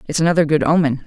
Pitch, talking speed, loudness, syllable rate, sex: 155 Hz, 225 wpm, -16 LUFS, 7.7 syllables/s, female